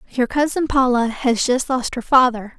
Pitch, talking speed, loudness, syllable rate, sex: 250 Hz, 185 wpm, -18 LUFS, 4.6 syllables/s, female